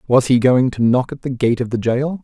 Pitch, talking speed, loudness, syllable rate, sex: 125 Hz, 295 wpm, -17 LUFS, 5.3 syllables/s, male